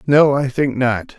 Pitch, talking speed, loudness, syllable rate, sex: 130 Hz, 200 wpm, -16 LUFS, 3.8 syllables/s, male